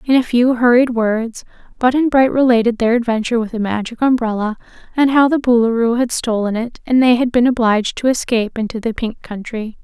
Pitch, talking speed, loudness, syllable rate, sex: 235 Hz, 195 wpm, -16 LUFS, 5.7 syllables/s, female